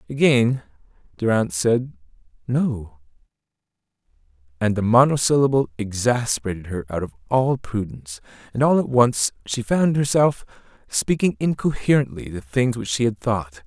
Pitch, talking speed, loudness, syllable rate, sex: 115 Hz, 125 wpm, -21 LUFS, 4.9 syllables/s, male